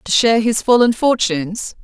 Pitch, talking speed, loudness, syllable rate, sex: 220 Hz, 165 wpm, -15 LUFS, 5.3 syllables/s, female